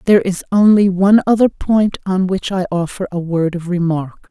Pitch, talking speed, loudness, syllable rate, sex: 185 Hz, 195 wpm, -15 LUFS, 5.2 syllables/s, female